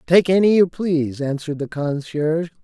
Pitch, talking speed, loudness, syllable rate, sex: 160 Hz, 160 wpm, -19 LUFS, 5.4 syllables/s, male